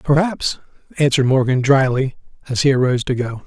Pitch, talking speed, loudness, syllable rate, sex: 135 Hz, 155 wpm, -17 LUFS, 6.0 syllables/s, male